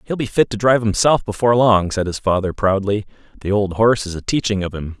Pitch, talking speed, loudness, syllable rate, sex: 105 Hz, 240 wpm, -18 LUFS, 6.2 syllables/s, male